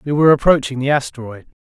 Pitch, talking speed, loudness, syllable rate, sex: 135 Hz, 180 wpm, -15 LUFS, 7.1 syllables/s, male